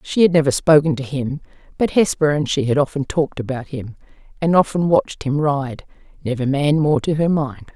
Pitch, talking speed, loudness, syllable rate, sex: 145 Hz, 195 wpm, -18 LUFS, 5.4 syllables/s, female